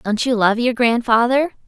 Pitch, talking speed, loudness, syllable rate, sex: 235 Hz, 180 wpm, -17 LUFS, 4.9 syllables/s, female